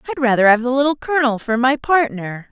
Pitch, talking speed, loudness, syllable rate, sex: 255 Hz, 215 wpm, -16 LUFS, 6.3 syllables/s, female